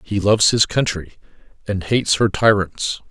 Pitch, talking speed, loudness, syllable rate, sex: 100 Hz, 155 wpm, -17 LUFS, 4.9 syllables/s, male